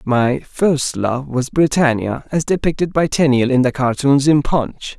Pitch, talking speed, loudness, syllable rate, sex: 135 Hz, 170 wpm, -16 LUFS, 4.2 syllables/s, male